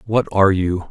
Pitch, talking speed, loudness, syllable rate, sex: 100 Hz, 200 wpm, -17 LUFS, 5.6 syllables/s, male